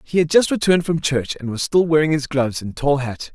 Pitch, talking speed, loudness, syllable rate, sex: 150 Hz, 270 wpm, -19 LUFS, 5.9 syllables/s, male